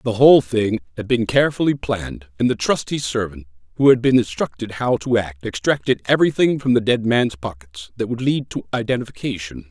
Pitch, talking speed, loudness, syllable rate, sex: 115 Hz, 185 wpm, -19 LUFS, 5.6 syllables/s, male